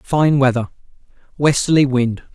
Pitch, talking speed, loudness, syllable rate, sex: 135 Hz, 100 wpm, -16 LUFS, 4.7 syllables/s, male